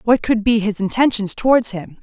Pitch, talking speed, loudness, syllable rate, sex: 220 Hz, 205 wpm, -17 LUFS, 5.2 syllables/s, female